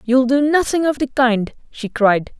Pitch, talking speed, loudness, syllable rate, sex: 255 Hz, 200 wpm, -16 LUFS, 4.2 syllables/s, female